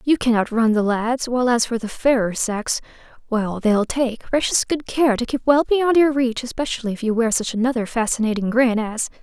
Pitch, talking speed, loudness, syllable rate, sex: 240 Hz, 195 wpm, -20 LUFS, 5.2 syllables/s, female